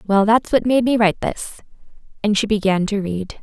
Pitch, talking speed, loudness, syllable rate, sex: 210 Hz, 210 wpm, -18 LUFS, 5.3 syllables/s, female